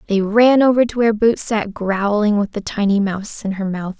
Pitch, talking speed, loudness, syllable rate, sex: 210 Hz, 225 wpm, -17 LUFS, 5.3 syllables/s, female